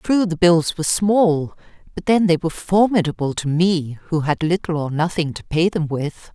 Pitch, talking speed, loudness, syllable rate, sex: 170 Hz, 215 wpm, -19 LUFS, 5.1 syllables/s, female